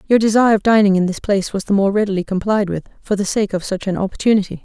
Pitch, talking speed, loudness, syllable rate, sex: 200 Hz, 260 wpm, -17 LUFS, 7.2 syllables/s, female